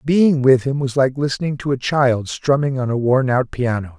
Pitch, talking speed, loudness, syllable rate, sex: 130 Hz, 225 wpm, -18 LUFS, 4.9 syllables/s, male